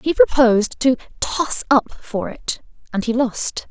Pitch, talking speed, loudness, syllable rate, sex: 255 Hz, 145 wpm, -19 LUFS, 3.9 syllables/s, female